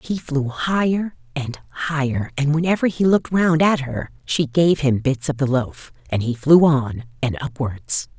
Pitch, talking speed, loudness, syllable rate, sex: 145 Hz, 185 wpm, -20 LUFS, 4.4 syllables/s, female